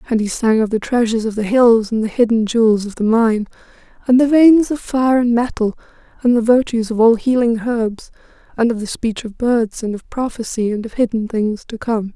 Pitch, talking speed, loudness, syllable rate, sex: 230 Hz, 220 wpm, -16 LUFS, 5.3 syllables/s, female